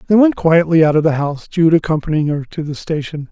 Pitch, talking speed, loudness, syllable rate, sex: 160 Hz, 235 wpm, -15 LUFS, 6.2 syllables/s, male